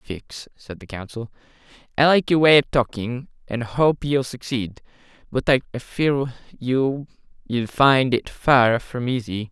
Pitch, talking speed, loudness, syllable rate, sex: 125 Hz, 150 wpm, -20 LUFS, 4.2 syllables/s, male